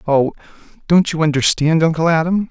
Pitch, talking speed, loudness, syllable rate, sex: 160 Hz, 145 wpm, -15 LUFS, 5.4 syllables/s, male